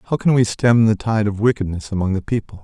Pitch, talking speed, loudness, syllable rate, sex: 110 Hz, 250 wpm, -18 LUFS, 5.8 syllables/s, male